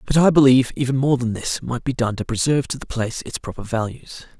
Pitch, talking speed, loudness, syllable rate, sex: 130 Hz, 245 wpm, -20 LUFS, 6.3 syllables/s, male